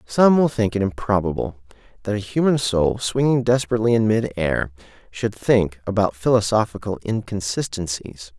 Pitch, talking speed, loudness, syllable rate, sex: 105 Hz, 130 wpm, -21 LUFS, 5.1 syllables/s, male